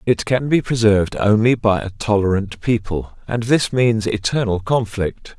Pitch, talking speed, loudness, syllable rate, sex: 110 Hz, 155 wpm, -18 LUFS, 4.5 syllables/s, male